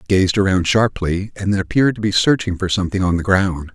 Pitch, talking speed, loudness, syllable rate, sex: 95 Hz, 240 wpm, -17 LUFS, 6.3 syllables/s, male